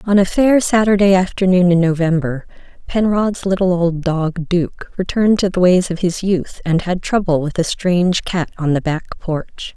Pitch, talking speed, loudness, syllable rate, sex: 180 Hz, 185 wpm, -16 LUFS, 4.7 syllables/s, female